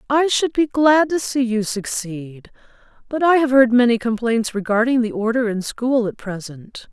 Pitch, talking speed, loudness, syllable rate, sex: 240 Hz, 180 wpm, -18 LUFS, 4.6 syllables/s, female